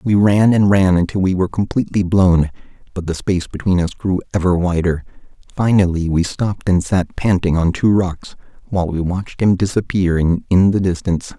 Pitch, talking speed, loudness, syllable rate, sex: 90 Hz, 180 wpm, -17 LUFS, 5.5 syllables/s, male